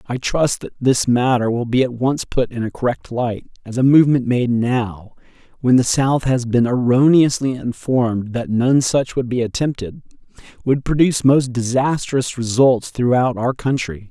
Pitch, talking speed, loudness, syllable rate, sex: 125 Hz, 170 wpm, -17 LUFS, 4.6 syllables/s, male